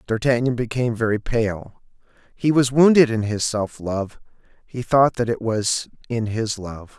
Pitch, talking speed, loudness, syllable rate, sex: 115 Hz, 165 wpm, -20 LUFS, 4.4 syllables/s, male